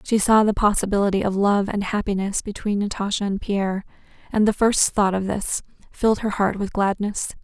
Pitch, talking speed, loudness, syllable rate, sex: 205 Hz, 185 wpm, -21 LUFS, 5.4 syllables/s, female